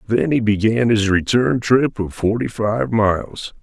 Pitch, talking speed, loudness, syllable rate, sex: 110 Hz, 165 wpm, -18 LUFS, 4.1 syllables/s, male